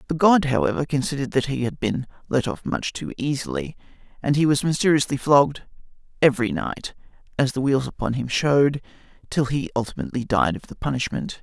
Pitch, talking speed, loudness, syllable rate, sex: 135 Hz, 175 wpm, -22 LUFS, 6.0 syllables/s, male